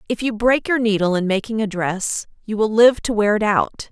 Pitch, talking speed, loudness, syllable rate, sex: 215 Hz, 245 wpm, -19 LUFS, 5.3 syllables/s, female